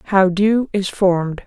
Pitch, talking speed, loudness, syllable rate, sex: 190 Hz, 165 wpm, -17 LUFS, 4.3 syllables/s, female